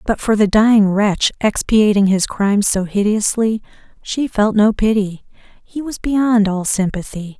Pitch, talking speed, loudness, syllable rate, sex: 210 Hz, 155 wpm, -16 LUFS, 4.4 syllables/s, female